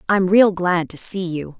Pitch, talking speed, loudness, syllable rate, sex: 180 Hz, 225 wpm, -18 LUFS, 4.3 syllables/s, female